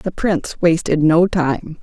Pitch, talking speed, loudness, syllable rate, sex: 165 Hz, 165 wpm, -16 LUFS, 4.1 syllables/s, female